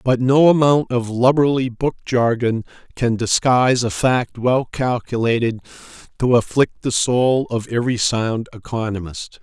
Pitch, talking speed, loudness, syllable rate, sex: 120 Hz, 135 wpm, -18 LUFS, 4.4 syllables/s, male